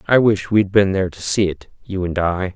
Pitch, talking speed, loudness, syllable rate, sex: 95 Hz, 280 wpm, -18 LUFS, 5.8 syllables/s, male